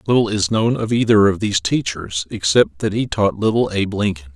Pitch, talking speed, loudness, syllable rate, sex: 100 Hz, 205 wpm, -18 LUFS, 5.5 syllables/s, male